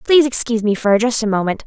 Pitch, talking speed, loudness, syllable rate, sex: 225 Hz, 255 wpm, -16 LUFS, 7.0 syllables/s, female